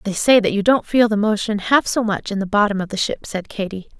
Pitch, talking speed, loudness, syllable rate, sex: 210 Hz, 285 wpm, -18 LUFS, 5.8 syllables/s, female